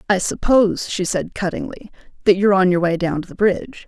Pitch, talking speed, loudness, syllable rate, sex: 190 Hz, 215 wpm, -18 LUFS, 6.0 syllables/s, female